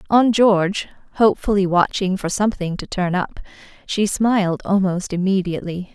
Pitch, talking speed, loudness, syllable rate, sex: 190 Hz, 130 wpm, -19 LUFS, 5.2 syllables/s, female